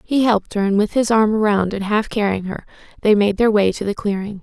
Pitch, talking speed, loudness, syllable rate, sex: 210 Hz, 260 wpm, -18 LUFS, 5.8 syllables/s, female